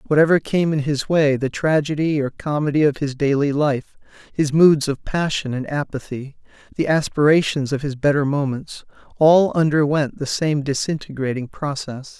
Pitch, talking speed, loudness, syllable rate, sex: 145 Hz, 155 wpm, -19 LUFS, 4.9 syllables/s, male